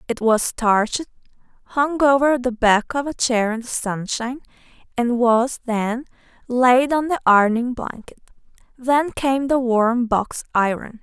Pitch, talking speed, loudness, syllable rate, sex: 245 Hz, 145 wpm, -19 LUFS, 4.1 syllables/s, female